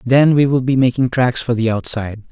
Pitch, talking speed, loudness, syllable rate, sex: 125 Hz, 235 wpm, -16 LUFS, 5.6 syllables/s, male